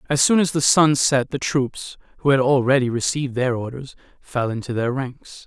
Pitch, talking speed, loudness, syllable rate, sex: 130 Hz, 200 wpm, -20 LUFS, 5.0 syllables/s, male